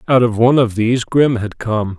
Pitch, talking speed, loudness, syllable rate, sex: 120 Hz, 240 wpm, -15 LUFS, 5.5 syllables/s, male